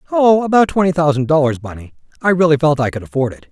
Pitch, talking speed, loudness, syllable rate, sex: 150 Hz, 190 wpm, -15 LUFS, 6.7 syllables/s, male